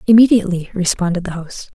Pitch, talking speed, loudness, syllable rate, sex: 190 Hz, 135 wpm, -16 LUFS, 6.4 syllables/s, female